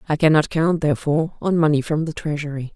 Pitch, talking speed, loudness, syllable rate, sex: 155 Hz, 195 wpm, -20 LUFS, 6.4 syllables/s, female